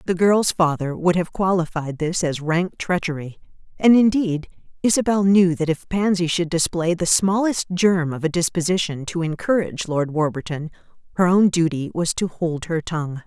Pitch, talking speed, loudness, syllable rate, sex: 170 Hz, 165 wpm, -20 LUFS, 4.9 syllables/s, female